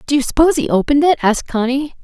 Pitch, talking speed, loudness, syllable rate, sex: 270 Hz, 235 wpm, -15 LUFS, 7.2 syllables/s, female